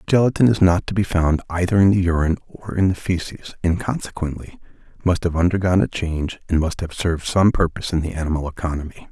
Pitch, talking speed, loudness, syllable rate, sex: 85 Hz, 210 wpm, -20 LUFS, 6.6 syllables/s, male